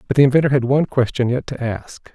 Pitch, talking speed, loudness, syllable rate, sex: 130 Hz, 250 wpm, -18 LUFS, 6.6 syllables/s, male